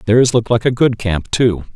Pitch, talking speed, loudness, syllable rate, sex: 115 Hz, 240 wpm, -15 LUFS, 5.3 syllables/s, male